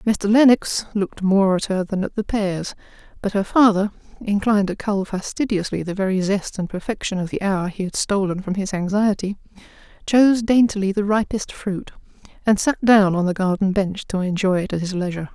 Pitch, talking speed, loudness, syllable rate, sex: 200 Hz, 190 wpm, -20 LUFS, 5.4 syllables/s, female